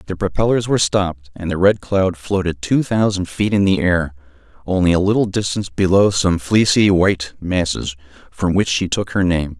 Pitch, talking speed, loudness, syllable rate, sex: 90 Hz, 190 wpm, -17 LUFS, 5.2 syllables/s, male